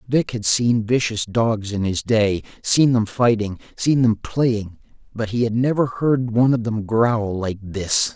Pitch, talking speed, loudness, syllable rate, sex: 115 Hz, 185 wpm, -20 LUFS, 4.0 syllables/s, male